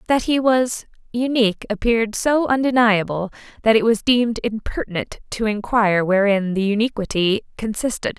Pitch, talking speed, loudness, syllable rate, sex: 220 Hz, 130 wpm, -19 LUFS, 5.2 syllables/s, female